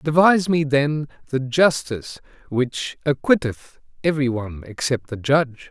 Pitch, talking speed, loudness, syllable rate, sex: 140 Hz, 125 wpm, -21 LUFS, 4.8 syllables/s, male